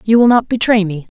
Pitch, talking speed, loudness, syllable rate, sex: 215 Hz, 250 wpm, -13 LUFS, 5.9 syllables/s, female